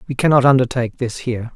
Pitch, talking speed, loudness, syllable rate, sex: 125 Hz, 195 wpm, -17 LUFS, 7.2 syllables/s, male